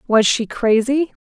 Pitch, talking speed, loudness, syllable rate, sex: 245 Hz, 145 wpm, -17 LUFS, 4.0 syllables/s, female